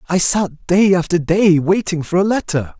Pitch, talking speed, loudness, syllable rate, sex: 180 Hz, 195 wpm, -15 LUFS, 4.6 syllables/s, male